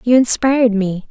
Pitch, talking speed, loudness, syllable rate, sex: 230 Hz, 165 wpm, -14 LUFS, 5.0 syllables/s, female